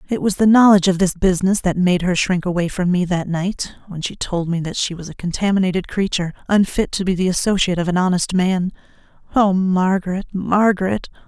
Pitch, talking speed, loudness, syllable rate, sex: 185 Hz, 200 wpm, -18 LUFS, 5.8 syllables/s, female